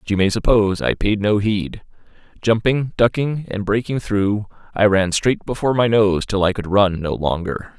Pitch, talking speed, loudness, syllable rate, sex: 105 Hz, 195 wpm, -19 LUFS, 4.9 syllables/s, male